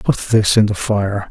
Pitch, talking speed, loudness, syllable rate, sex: 105 Hz, 230 wpm, -16 LUFS, 4.2 syllables/s, male